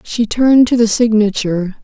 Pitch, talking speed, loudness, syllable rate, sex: 220 Hz, 165 wpm, -13 LUFS, 5.4 syllables/s, female